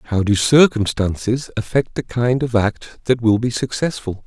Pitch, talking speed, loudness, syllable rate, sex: 115 Hz, 170 wpm, -18 LUFS, 4.6 syllables/s, male